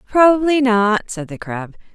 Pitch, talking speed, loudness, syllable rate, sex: 230 Hz, 155 wpm, -16 LUFS, 4.6 syllables/s, female